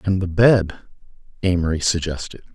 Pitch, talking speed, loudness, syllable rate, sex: 90 Hz, 120 wpm, -19 LUFS, 5.1 syllables/s, male